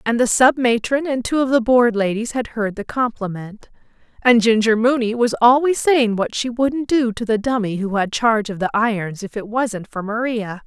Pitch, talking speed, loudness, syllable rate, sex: 230 Hz, 215 wpm, -18 LUFS, 4.9 syllables/s, female